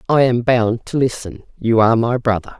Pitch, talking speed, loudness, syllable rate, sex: 115 Hz, 210 wpm, -17 LUFS, 5.2 syllables/s, female